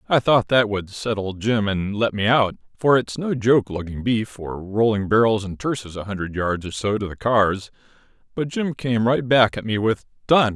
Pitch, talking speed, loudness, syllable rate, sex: 110 Hz, 215 wpm, -21 LUFS, 4.7 syllables/s, male